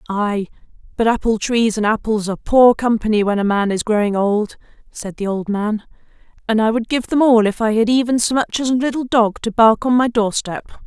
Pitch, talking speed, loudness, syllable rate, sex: 220 Hz, 225 wpm, -17 LUFS, 5.4 syllables/s, female